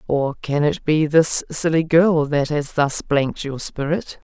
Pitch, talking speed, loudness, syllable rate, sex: 150 Hz, 180 wpm, -19 LUFS, 4.0 syllables/s, female